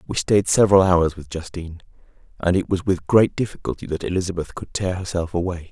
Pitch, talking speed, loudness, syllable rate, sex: 90 Hz, 190 wpm, -21 LUFS, 6.0 syllables/s, male